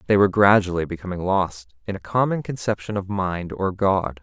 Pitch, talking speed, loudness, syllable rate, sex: 100 Hz, 185 wpm, -22 LUFS, 5.3 syllables/s, male